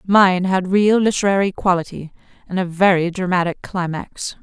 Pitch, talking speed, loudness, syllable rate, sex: 185 Hz, 135 wpm, -18 LUFS, 4.8 syllables/s, female